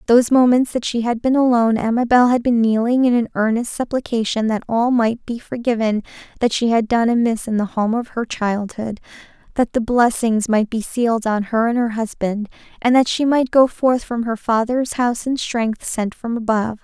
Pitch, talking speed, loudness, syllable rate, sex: 235 Hz, 205 wpm, -18 LUFS, 5.2 syllables/s, female